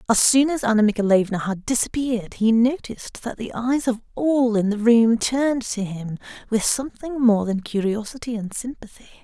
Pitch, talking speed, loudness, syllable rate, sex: 230 Hz, 175 wpm, -21 LUFS, 5.2 syllables/s, female